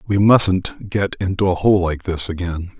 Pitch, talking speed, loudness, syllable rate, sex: 95 Hz, 195 wpm, -18 LUFS, 4.4 syllables/s, male